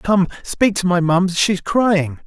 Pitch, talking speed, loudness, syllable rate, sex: 185 Hz, 210 wpm, -17 LUFS, 3.9 syllables/s, male